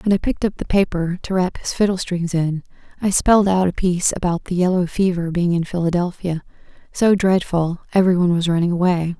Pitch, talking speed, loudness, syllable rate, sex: 180 Hz, 200 wpm, -19 LUFS, 6.0 syllables/s, female